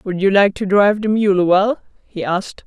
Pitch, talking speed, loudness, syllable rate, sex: 200 Hz, 225 wpm, -16 LUFS, 5.9 syllables/s, female